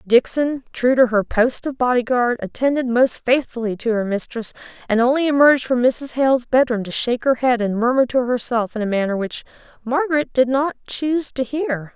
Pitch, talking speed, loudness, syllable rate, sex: 250 Hz, 200 wpm, -19 LUFS, 5.4 syllables/s, female